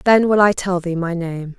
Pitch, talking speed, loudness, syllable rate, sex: 185 Hz, 265 wpm, -17 LUFS, 4.8 syllables/s, female